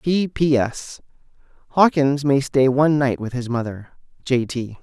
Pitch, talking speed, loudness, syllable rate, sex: 135 Hz, 150 wpm, -19 LUFS, 4.2 syllables/s, male